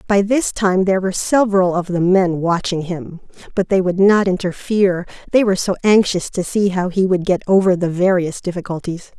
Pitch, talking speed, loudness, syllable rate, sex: 185 Hz, 195 wpm, -17 LUFS, 5.5 syllables/s, female